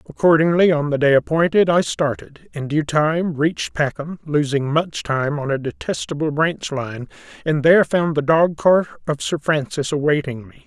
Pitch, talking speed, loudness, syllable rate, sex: 150 Hz, 170 wpm, -19 LUFS, 4.9 syllables/s, male